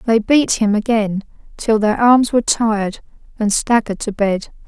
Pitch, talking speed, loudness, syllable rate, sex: 220 Hz, 165 wpm, -16 LUFS, 4.7 syllables/s, female